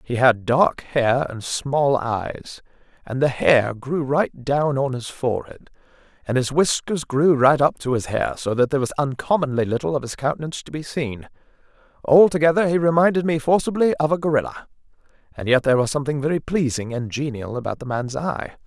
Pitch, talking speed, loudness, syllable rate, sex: 140 Hz, 185 wpm, -21 LUFS, 5.3 syllables/s, male